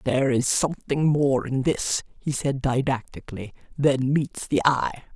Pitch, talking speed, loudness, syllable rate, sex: 135 Hz, 150 wpm, -24 LUFS, 4.4 syllables/s, female